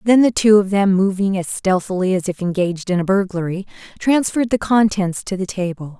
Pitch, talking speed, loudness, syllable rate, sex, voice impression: 195 Hz, 200 wpm, -18 LUFS, 5.6 syllables/s, female, very feminine, slightly adult-like, thin, tensed, powerful, bright, soft, very clear, fluent, slightly raspy, slightly cute, cool, intellectual, very refreshing, sincere, calm, very friendly, very reassuring, very unique, elegant, wild, sweet, very lively, kind, slightly intense, light